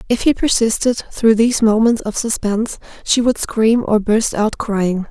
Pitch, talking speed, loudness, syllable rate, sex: 225 Hz, 175 wpm, -16 LUFS, 4.5 syllables/s, female